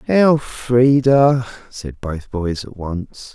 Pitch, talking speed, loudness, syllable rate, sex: 120 Hz, 110 wpm, -17 LUFS, 2.7 syllables/s, male